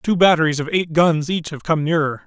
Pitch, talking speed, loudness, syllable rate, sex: 160 Hz, 240 wpm, -18 LUFS, 5.4 syllables/s, male